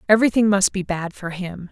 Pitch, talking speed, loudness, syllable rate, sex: 190 Hz, 210 wpm, -20 LUFS, 5.9 syllables/s, female